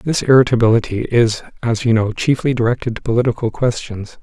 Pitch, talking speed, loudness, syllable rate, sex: 115 Hz, 155 wpm, -16 LUFS, 5.8 syllables/s, male